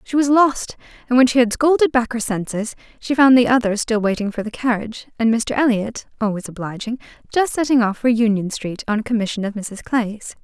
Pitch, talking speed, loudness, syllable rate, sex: 235 Hz, 215 wpm, -19 LUFS, 5.4 syllables/s, female